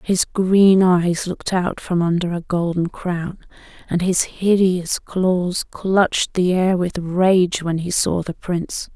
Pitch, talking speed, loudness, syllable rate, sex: 180 Hz, 160 wpm, -19 LUFS, 3.6 syllables/s, female